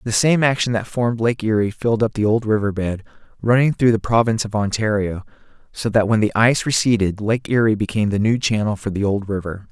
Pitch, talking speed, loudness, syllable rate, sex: 110 Hz, 215 wpm, -19 LUFS, 6.1 syllables/s, male